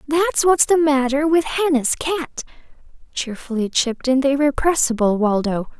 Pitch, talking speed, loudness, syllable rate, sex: 280 Hz, 135 wpm, -18 LUFS, 4.7 syllables/s, female